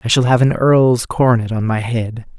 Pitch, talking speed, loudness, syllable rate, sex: 120 Hz, 225 wpm, -15 LUFS, 5.1 syllables/s, male